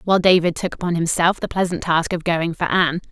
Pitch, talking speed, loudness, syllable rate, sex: 170 Hz, 230 wpm, -19 LUFS, 6.2 syllables/s, female